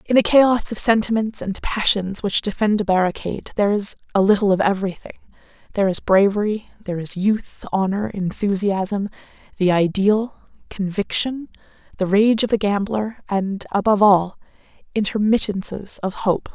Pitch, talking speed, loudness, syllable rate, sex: 205 Hz, 140 wpm, -20 LUFS, 5.1 syllables/s, female